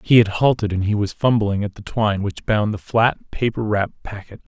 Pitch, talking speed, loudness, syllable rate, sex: 105 Hz, 225 wpm, -20 LUFS, 5.3 syllables/s, male